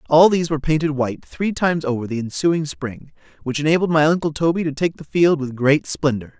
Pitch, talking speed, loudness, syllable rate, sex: 150 Hz, 215 wpm, -19 LUFS, 6.0 syllables/s, male